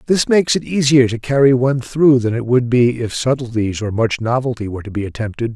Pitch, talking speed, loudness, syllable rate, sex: 125 Hz, 225 wpm, -16 LUFS, 6.0 syllables/s, male